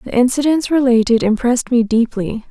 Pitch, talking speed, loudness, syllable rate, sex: 240 Hz, 145 wpm, -15 LUFS, 5.5 syllables/s, female